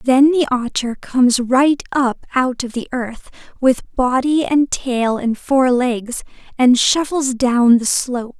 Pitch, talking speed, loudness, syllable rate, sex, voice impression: 255 Hz, 155 wpm, -16 LUFS, 3.7 syllables/s, female, feminine, adult-like, bright, soft, muffled, raspy, friendly, slightly reassuring, elegant, intense, sharp